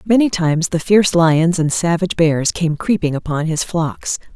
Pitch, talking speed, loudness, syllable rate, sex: 170 Hz, 180 wpm, -16 LUFS, 4.9 syllables/s, female